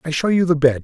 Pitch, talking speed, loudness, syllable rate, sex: 155 Hz, 360 wpm, -17 LUFS, 6.9 syllables/s, male